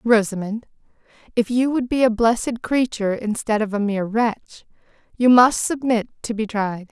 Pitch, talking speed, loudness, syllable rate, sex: 225 Hz, 165 wpm, -20 LUFS, 5.2 syllables/s, female